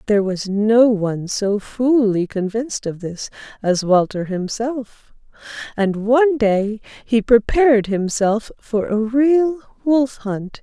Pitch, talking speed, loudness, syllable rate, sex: 225 Hz, 130 wpm, -18 LUFS, 3.8 syllables/s, female